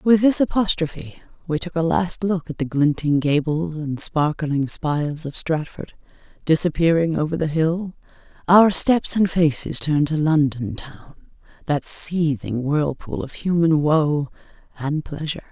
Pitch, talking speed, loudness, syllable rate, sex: 155 Hz, 145 wpm, -20 LUFS, 4.3 syllables/s, female